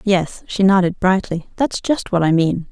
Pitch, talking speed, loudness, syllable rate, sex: 190 Hz, 200 wpm, -17 LUFS, 4.5 syllables/s, female